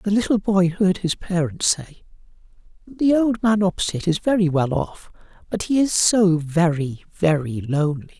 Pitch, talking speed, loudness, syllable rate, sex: 180 Hz, 160 wpm, -20 LUFS, 4.7 syllables/s, male